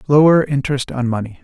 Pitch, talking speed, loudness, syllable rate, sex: 135 Hz, 170 wpm, -16 LUFS, 6.3 syllables/s, male